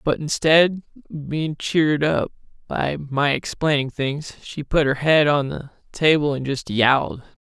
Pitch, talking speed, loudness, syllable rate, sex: 145 Hz, 160 wpm, -20 LUFS, 4.1 syllables/s, male